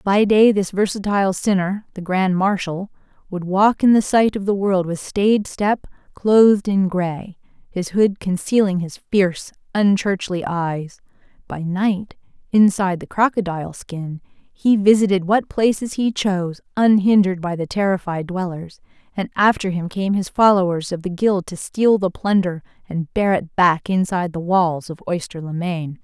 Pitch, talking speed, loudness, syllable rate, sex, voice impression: 190 Hz, 160 wpm, -19 LUFS, 4.5 syllables/s, female, slightly gender-neutral, adult-like, slightly hard, clear, fluent, intellectual, calm, slightly strict, sharp, modest